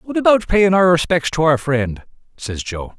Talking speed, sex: 200 wpm, male